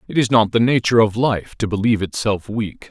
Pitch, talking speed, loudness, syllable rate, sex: 110 Hz, 225 wpm, -18 LUFS, 5.9 syllables/s, male